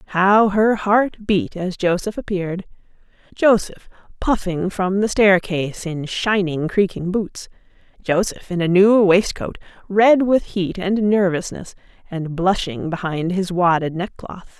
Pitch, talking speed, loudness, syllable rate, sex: 190 Hz, 125 wpm, -19 LUFS, 4.1 syllables/s, female